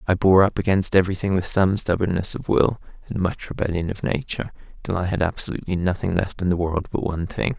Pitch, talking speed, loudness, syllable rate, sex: 90 Hz, 215 wpm, -22 LUFS, 6.3 syllables/s, male